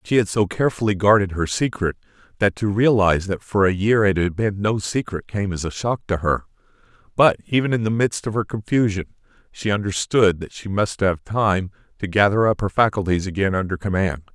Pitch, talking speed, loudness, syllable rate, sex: 100 Hz, 200 wpm, -20 LUFS, 5.5 syllables/s, male